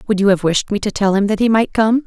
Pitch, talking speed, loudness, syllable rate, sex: 210 Hz, 350 wpm, -16 LUFS, 6.3 syllables/s, female